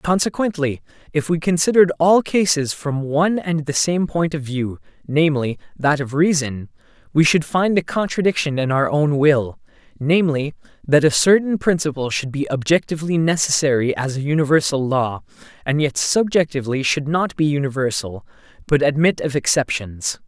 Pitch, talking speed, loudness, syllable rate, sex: 150 Hz, 150 wpm, -19 LUFS, 5.1 syllables/s, male